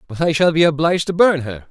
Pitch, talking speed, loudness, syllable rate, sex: 155 Hz, 280 wpm, -16 LUFS, 6.5 syllables/s, male